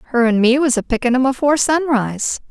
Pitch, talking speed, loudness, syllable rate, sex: 255 Hz, 215 wpm, -16 LUFS, 6.4 syllables/s, female